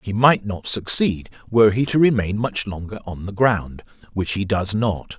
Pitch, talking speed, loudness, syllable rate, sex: 105 Hz, 185 wpm, -20 LUFS, 4.6 syllables/s, male